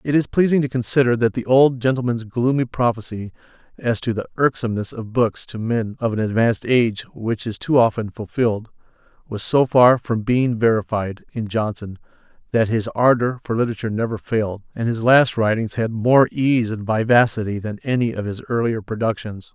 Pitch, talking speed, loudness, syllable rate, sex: 115 Hz, 180 wpm, -20 LUFS, 5.4 syllables/s, male